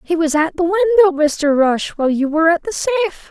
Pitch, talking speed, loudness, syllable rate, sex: 335 Hz, 235 wpm, -16 LUFS, 6.9 syllables/s, female